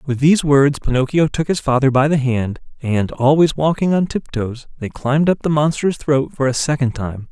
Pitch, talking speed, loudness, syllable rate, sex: 140 Hz, 205 wpm, -17 LUFS, 5.1 syllables/s, male